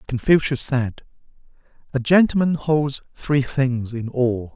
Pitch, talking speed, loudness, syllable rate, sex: 135 Hz, 120 wpm, -20 LUFS, 3.9 syllables/s, male